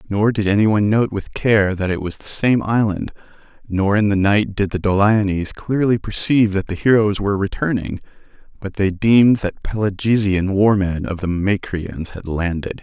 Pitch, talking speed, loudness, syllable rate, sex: 100 Hz, 180 wpm, -18 LUFS, 4.8 syllables/s, male